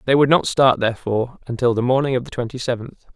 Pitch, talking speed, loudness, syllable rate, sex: 125 Hz, 230 wpm, -19 LUFS, 6.6 syllables/s, male